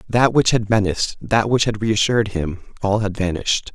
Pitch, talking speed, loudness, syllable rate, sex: 105 Hz, 175 wpm, -19 LUFS, 5.4 syllables/s, male